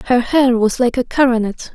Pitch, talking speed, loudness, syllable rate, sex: 245 Hz, 205 wpm, -15 LUFS, 5.3 syllables/s, female